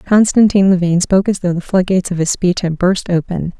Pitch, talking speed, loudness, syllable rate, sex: 185 Hz, 215 wpm, -14 LUFS, 5.8 syllables/s, female